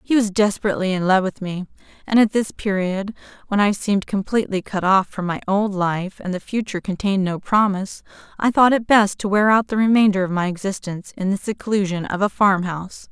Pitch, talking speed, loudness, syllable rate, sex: 195 Hz, 210 wpm, -20 LUFS, 5.8 syllables/s, female